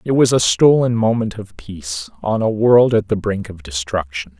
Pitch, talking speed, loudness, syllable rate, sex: 105 Hz, 205 wpm, -17 LUFS, 4.8 syllables/s, male